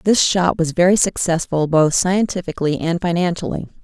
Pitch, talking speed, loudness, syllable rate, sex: 175 Hz, 140 wpm, -17 LUFS, 5.4 syllables/s, female